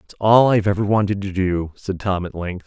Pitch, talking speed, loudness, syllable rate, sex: 100 Hz, 250 wpm, -19 LUFS, 5.7 syllables/s, male